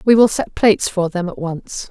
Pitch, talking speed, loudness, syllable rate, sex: 195 Hz, 250 wpm, -17 LUFS, 5.0 syllables/s, female